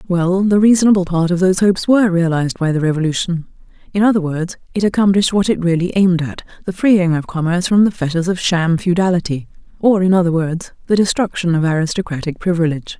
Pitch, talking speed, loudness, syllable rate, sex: 180 Hz, 190 wpm, -16 LUFS, 6.4 syllables/s, female